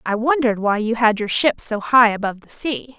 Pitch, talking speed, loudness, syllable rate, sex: 230 Hz, 240 wpm, -18 LUFS, 5.5 syllables/s, female